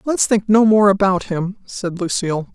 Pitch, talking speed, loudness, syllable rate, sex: 200 Hz, 190 wpm, -17 LUFS, 4.7 syllables/s, female